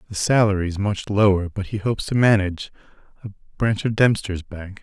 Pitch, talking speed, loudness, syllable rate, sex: 100 Hz, 160 wpm, -20 LUFS, 5.5 syllables/s, male